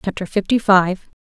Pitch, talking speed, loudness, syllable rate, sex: 195 Hz, 145 wpm, -17 LUFS, 4.9 syllables/s, female